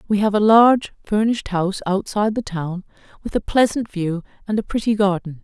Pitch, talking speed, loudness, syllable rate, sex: 200 Hz, 190 wpm, -19 LUFS, 5.8 syllables/s, female